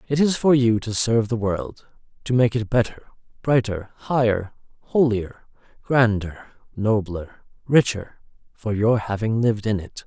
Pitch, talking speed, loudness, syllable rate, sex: 115 Hz, 145 wpm, -22 LUFS, 4.6 syllables/s, male